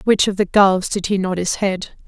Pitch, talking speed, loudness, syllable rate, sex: 190 Hz, 290 wpm, -18 LUFS, 5.1 syllables/s, female